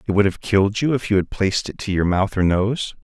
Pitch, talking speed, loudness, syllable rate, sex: 100 Hz, 295 wpm, -20 LUFS, 6.0 syllables/s, male